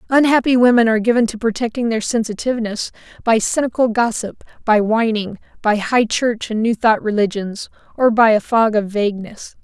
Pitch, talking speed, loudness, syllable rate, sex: 225 Hz, 160 wpm, -17 LUFS, 5.4 syllables/s, female